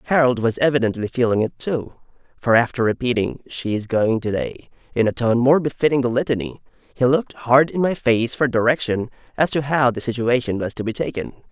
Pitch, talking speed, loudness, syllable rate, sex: 125 Hz, 195 wpm, -20 LUFS, 5.6 syllables/s, male